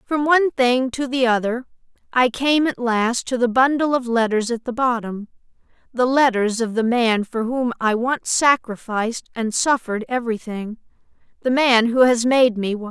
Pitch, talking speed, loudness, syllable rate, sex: 240 Hz, 180 wpm, -19 LUFS, 4.9 syllables/s, female